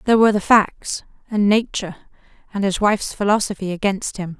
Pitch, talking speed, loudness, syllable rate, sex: 200 Hz, 165 wpm, -19 LUFS, 5.9 syllables/s, female